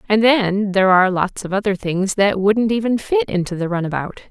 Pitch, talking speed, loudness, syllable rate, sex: 200 Hz, 210 wpm, -18 LUFS, 5.4 syllables/s, female